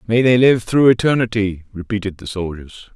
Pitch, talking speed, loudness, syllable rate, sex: 105 Hz, 160 wpm, -17 LUFS, 5.3 syllables/s, male